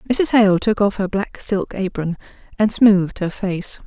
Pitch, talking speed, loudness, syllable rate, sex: 200 Hz, 185 wpm, -18 LUFS, 4.4 syllables/s, female